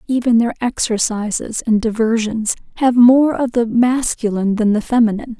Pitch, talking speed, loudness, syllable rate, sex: 230 Hz, 145 wpm, -16 LUFS, 5.1 syllables/s, female